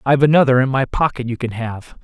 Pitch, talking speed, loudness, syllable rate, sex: 130 Hz, 235 wpm, -17 LUFS, 6.3 syllables/s, male